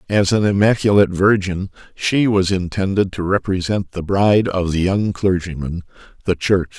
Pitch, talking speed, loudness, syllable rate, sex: 95 Hz, 150 wpm, -18 LUFS, 4.9 syllables/s, male